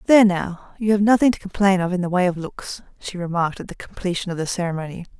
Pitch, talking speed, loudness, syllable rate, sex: 185 Hz, 245 wpm, -21 LUFS, 6.5 syllables/s, female